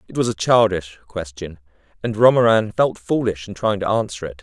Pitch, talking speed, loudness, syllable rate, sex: 100 Hz, 190 wpm, -19 LUFS, 5.3 syllables/s, male